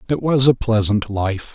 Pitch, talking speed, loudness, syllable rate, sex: 115 Hz, 195 wpm, -18 LUFS, 4.4 syllables/s, male